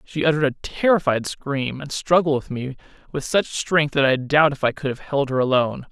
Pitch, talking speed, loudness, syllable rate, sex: 145 Hz, 225 wpm, -21 LUFS, 5.3 syllables/s, male